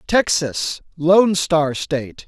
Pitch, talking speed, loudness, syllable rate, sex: 160 Hz, 105 wpm, -18 LUFS, 3.0 syllables/s, male